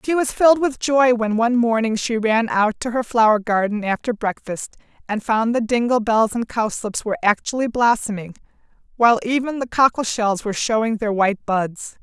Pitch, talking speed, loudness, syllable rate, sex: 225 Hz, 185 wpm, -19 LUFS, 5.3 syllables/s, female